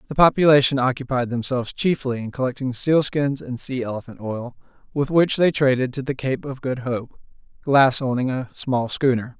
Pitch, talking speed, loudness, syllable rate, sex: 130 Hz, 170 wpm, -21 LUFS, 5.2 syllables/s, male